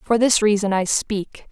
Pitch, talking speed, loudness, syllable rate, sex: 210 Hz, 200 wpm, -19 LUFS, 4.1 syllables/s, female